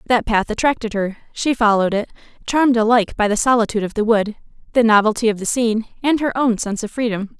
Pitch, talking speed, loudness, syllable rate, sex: 225 Hz, 210 wpm, -18 LUFS, 6.7 syllables/s, female